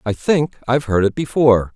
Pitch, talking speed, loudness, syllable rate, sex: 125 Hz, 205 wpm, -17 LUFS, 5.7 syllables/s, male